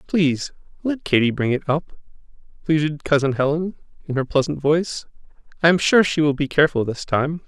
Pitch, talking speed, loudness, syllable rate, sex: 150 Hz, 175 wpm, -20 LUFS, 5.6 syllables/s, male